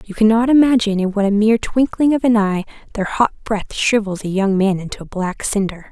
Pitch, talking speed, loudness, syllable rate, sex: 210 Hz, 225 wpm, -17 LUFS, 5.8 syllables/s, female